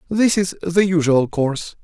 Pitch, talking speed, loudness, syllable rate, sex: 170 Hz, 165 wpm, -18 LUFS, 4.6 syllables/s, male